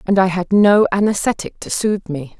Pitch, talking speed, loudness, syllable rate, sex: 190 Hz, 200 wpm, -16 LUFS, 5.4 syllables/s, female